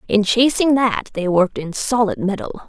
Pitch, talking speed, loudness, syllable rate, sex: 215 Hz, 180 wpm, -18 LUFS, 4.9 syllables/s, female